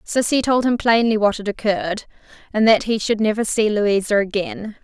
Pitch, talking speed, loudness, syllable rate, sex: 215 Hz, 185 wpm, -19 LUFS, 5.2 syllables/s, female